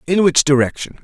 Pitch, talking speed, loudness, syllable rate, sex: 160 Hz, 175 wpm, -15 LUFS, 5.8 syllables/s, male